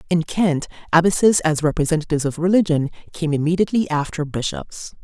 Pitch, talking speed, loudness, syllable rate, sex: 165 Hz, 130 wpm, -19 LUFS, 6.0 syllables/s, female